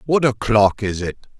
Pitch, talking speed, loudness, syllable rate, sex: 115 Hz, 175 wpm, -18 LUFS, 4.2 syllables/s, male